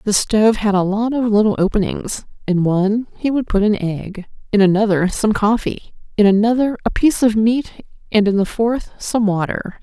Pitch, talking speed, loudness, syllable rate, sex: 210 Hz, 190 wpm, -17 LUFS, 5.1 syllables/s, female